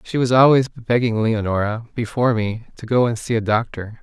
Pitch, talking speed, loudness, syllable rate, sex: 115 Hz, 195 wpm, -19 LUFS, 5.3 syllables/s, male